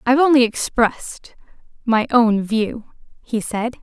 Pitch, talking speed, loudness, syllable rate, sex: 235 Hz, 125 wpm, -18 LUFS, 4.3 syllables/s, female